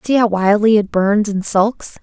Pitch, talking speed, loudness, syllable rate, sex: 210 Hz, 205 wpm, -15 LUFS, 4.2 syllables/s, female